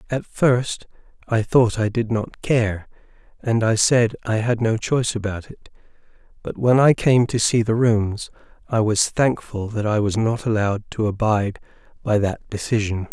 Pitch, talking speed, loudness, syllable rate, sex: 110 Hz, 175 wpm, -20 LUFS, 4.5 syllables/s, male